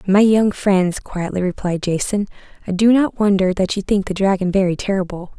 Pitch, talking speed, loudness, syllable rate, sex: 195 Hz, 190 wpm, -18 LUFS, 5.2 syllables/s, female